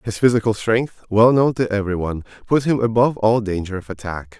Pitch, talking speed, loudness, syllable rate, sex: 110 Hz, 190 wpm, -19 LUFS, 6.0 syllables/s, male